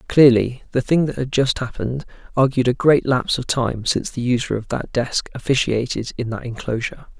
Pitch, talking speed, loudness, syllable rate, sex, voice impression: 125 Hz, 190 wpm, -20 LUFS, 5.6 syllables/s, male, masculine, adult-like, relaxed, powerful, raspy, intellectual, sincere, friendly, reassuring, slightly unique, kind, modest